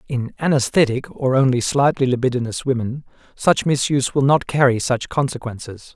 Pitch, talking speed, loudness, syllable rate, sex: 130 Hz, 140 wpm, -19 LUFS, 5.3 syllables/s, male